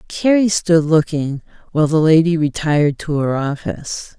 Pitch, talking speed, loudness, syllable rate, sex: 160 Hz, 145 wpm, -16 LUFS, 4.8 syllables/s, female